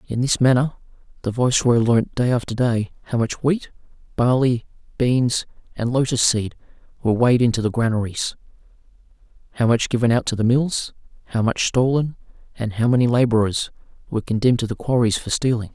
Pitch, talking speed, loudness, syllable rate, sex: 120 Hz, 165 wpm, -20 LUFS, 5.9 syllables/s, male